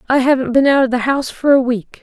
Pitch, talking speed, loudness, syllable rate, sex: 260 Hz, 295 wpm, -14 LUFS, 6.5 syllables/s, female